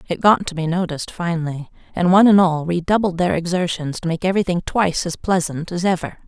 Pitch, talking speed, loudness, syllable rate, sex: 175 Hz, 200 wpm, -19 LUFS, 6.2 syllables/s, female